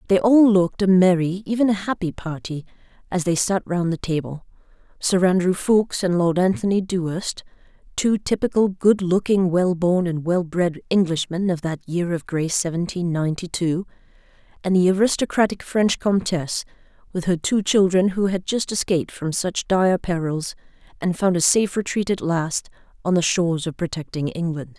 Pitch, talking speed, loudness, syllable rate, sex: 180 Hz, 170 wpm, -21 LUFS, 5.1 syllables/s, female